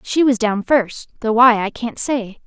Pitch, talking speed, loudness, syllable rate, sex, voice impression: 230 Hz, 220 wpm, -17 LUFS, 4.1 syllables/s, female, feminine, adult-like, tensed, bright, clear, friendly, unique, lively, intense, slightly sharp, light